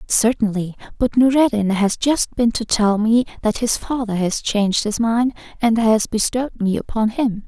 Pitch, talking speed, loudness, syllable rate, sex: 225 Hz, 175 wpm, -18 LUFS, 4.7 syllables/s, female